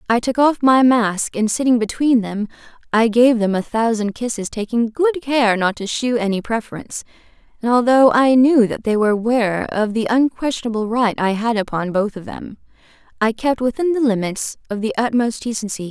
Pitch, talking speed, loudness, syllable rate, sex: 230 Hz, 190 wpm, -18 LUFS, 5.2 syllables/s, female